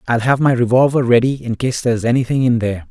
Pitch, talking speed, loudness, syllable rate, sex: 120 Hz, 250 wpm, -15 LUFS, 7.0 syllables/s, male